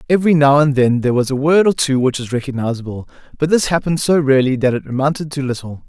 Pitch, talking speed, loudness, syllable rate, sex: 140 Hz, 235 wpm, -16 LUFS, 6.9 syllables/s, male